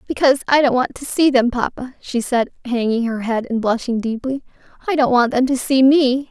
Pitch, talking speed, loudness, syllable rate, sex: 255 Hz, 220 wpm, -18 LUFS, 5.4 syllables/s, female